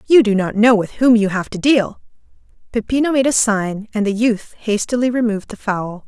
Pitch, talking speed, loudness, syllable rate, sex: 220 Hz, 205 wpm, -17 LUFS, 5.3 syllables/s, female